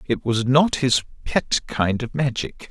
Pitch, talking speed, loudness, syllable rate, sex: 130 Hz, 180 wpm, -21 LUFS, 3.8 syllables/s, male